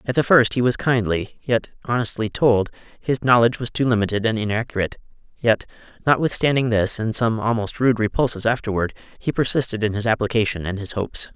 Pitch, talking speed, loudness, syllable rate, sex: 115 Hz, 175 wpm, -20 LUFS, 6.0 syllables/s, male